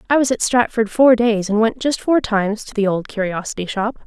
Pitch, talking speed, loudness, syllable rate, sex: 225 Hz, 235 wpm, -18 LUFS, 5.5 syllables/s, female